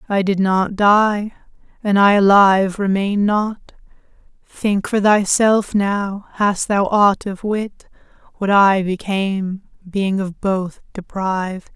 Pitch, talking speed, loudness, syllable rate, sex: 200 Hz, 130 wpm, -17 LUFS, 3.7 syllables/s, female